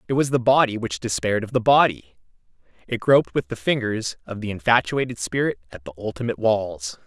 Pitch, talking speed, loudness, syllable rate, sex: 110 Hz, 180 wpm, -22 LUFS, 5.9 syllables/s, male